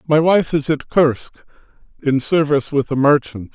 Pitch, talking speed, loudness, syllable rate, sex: 145 Hz, 170 wpm, -17 LUFS, 5.0 syllables/s, male